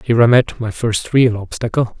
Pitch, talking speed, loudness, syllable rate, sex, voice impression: 115 Hz, 210 wpm, -16 LUFS, 5.1 syllables/s, male, masculine, middle-aged, slightly thick, slightly muffled, slightly fluent, sincere, slightly calm, friendly